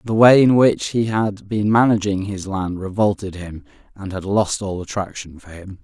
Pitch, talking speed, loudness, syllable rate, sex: 100 Hz, 195 wpm, -18 LUFS, 4.7 syllables/s, male